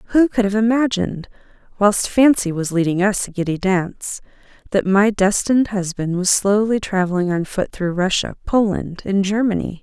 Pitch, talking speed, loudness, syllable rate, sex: 200 Hz, 160 wpm, -18 LUFS, 5.0 syllables/s, female